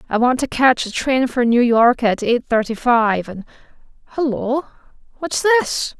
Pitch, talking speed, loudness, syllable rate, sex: 245 Hz, 160 wpm, -17 LUFS, 4.2 syllables/s, female